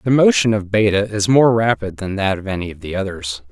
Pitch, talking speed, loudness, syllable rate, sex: 105 Hz, 240 wpm, -17 LUFS, 5.7 syllables/s, male